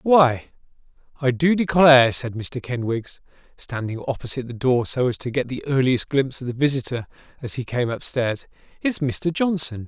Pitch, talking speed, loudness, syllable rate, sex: 130 Hz, 170 wpm, -21 LUFS, 5.0 syllables/s, male